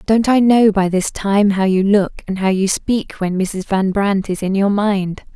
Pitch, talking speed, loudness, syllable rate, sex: 200 Hz, 235 wpm, -16 LUFS, 4.2 syllables/s, female